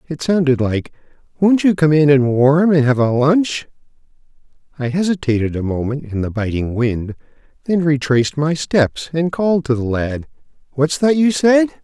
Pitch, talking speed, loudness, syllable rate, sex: 145 Hz, 165 wpm, -16 LUFS, 4.7 syllables/s, male